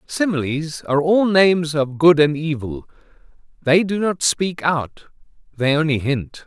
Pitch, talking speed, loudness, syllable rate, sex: 155 Hz, 150 wpm, -18 LUFS, 4.3 syllables/s, male